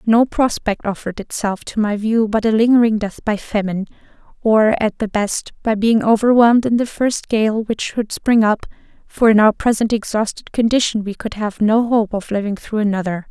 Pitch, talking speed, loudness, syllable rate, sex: 220 Hz, 195 wpm, -17 LUFS, 5.1 syllables/s, female